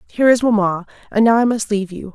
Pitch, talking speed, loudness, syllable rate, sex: 215 Hz, 250 wpm, -16 LUFS, 6.9 syllables/s, female